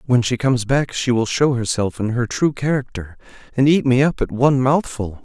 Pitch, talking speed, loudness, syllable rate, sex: 125 Hz, 220 wpm, -18 LUFS, 5.3 syllables/s, male